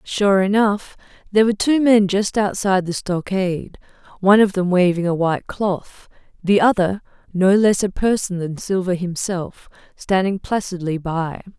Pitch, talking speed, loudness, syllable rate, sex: 190 Hz, 150 wpm, -19 LUFS, 4.7 syllables/s, female